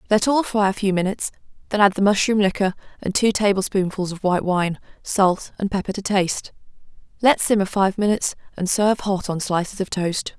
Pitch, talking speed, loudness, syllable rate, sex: 195 Hz, 190 wpm, -21 LUFS, 5.8 syllables/s, female